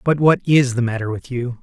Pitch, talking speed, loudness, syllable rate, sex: 130 Hz, 260 wpm, -18 LUFS, 5.5 syllables/s, male